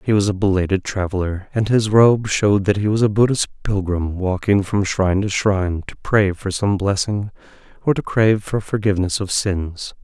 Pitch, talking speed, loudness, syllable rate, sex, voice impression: 100 Hz, 190 wpm, -19 LUFS, 5.1 syllables/s, male, masculine, adult-like, slightly dark, sweet